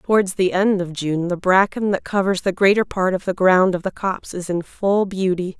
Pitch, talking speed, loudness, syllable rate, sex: 185 Hz, 235 wpm, -19 LUFS, 5.1 syllables/s, female